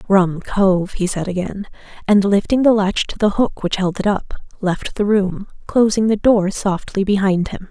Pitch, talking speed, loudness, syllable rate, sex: 195 Hz, 195 wpm, -17 LUFS, 4.5 syllables/s, female